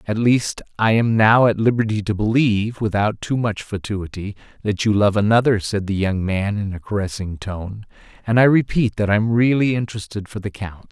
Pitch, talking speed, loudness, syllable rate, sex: 105 Hz, 200 wpm, -19 LUFS, 5.3 syllables/s, male